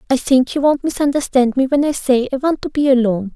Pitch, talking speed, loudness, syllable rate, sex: 265 Hz, 250 wpm, -16 LUFS, 6.1 syllables/s, female